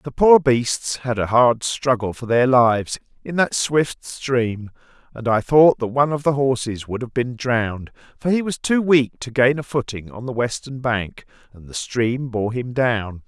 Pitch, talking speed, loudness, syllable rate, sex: 125 Hz, 205 wpm, -20 LUFS, 4.3 syllables/s, male